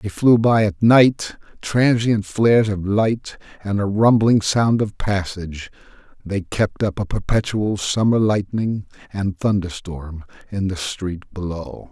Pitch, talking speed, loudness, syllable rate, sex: 100 Hz, 145 wpm, -19 LUFS, 4.0 syllables/s, male